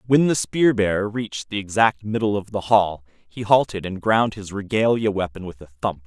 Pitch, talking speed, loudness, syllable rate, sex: 100 Hz, 210 wpm, -21 LUFS, 5.1 syllables/s, male